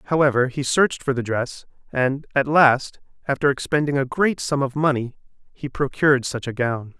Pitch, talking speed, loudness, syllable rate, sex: 135 Hz, 180 wpm, -21 LUFS, 5.2 syllables/s, male